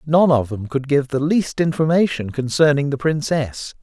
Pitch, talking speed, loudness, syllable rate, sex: 145 Hz, 170 wpm, -19 LUFS, 4.6 syllables/s, male